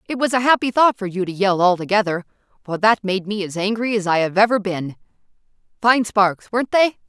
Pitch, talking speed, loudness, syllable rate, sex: 205 Hz, 220 wpm, -18 LUFS, 5.7 syllables/s, female